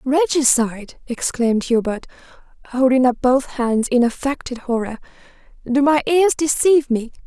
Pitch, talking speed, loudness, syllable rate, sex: 260 Hz, 125 wpm, -18 LUFS, 4.9 syllables/s, female